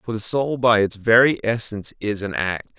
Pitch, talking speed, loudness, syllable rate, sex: 110 Hz, 215 wpm, -20 LUFS, 5.0 syllables/s, male